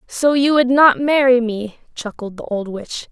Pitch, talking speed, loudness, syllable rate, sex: 250 Hz, 190 wpm, -15 LUFS, 4.3 syllables/s, female